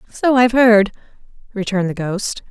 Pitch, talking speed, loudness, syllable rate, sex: 215 Hz, 145 wpm, -16 LUFS, 5.6 syllables/s, female